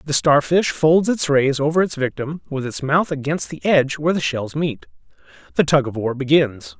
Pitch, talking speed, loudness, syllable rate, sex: 140 Hz, 205 wpm, -19 LUFS, 5.1 syllables/s, male